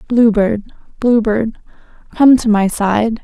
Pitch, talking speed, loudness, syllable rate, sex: 220 Hz, 150 wpm, -14 LUFS, 3.7 syllables/s, female